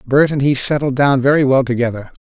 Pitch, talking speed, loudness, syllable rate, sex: 135 Hz, 215 wpm, -15 LUFS, 6.0 syllables/s, male